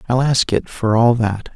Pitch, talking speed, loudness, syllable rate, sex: 120 Hz, 230 wpm, -17 LUFS, 4.4 syllables/s, male